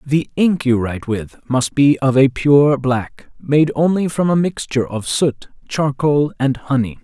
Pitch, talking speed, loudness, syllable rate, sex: 135 Hz, 180 wpm, -17 LUFS, 4.2 syllables/s, male